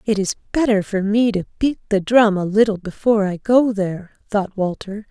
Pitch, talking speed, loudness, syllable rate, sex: 205 Hz, 200 wpm, -18 LUFS, 5.2 syllables/s, female